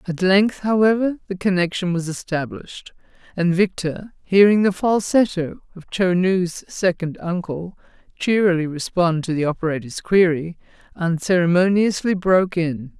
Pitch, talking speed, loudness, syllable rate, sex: 180 Hz, 120 wpm, -20 LUFS, 4.6 syllables/s, female